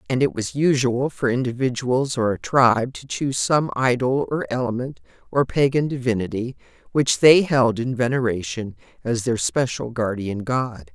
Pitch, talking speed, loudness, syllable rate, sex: 125 Hz, 155 wpm, -21 LUFS, 4.7 syllables/s, female